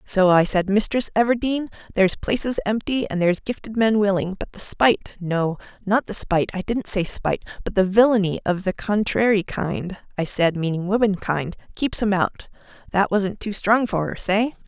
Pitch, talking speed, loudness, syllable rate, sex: 200 Hz, 170 wpm, -21 LUFS, 5.0 syllables/s, female